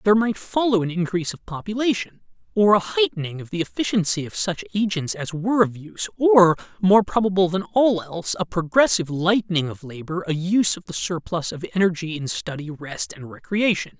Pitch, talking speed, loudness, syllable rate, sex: 180 Hz, 180 wpm, -22 LUFS, 5.7 syllables/s, male